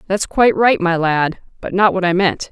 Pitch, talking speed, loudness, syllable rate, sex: 185 Hz, 240 wpm, -15 LUFS, 5.1 syllables/s, female